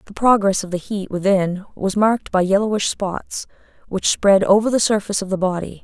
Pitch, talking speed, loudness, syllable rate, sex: 200 Hz, 195 wpm, -18 LUFS, 5.5 syllables/s, female